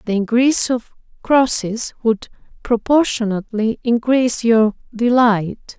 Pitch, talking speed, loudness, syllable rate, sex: 230 Hz, 95 wpm, -17 LUFS, 4.2 syllables/s, female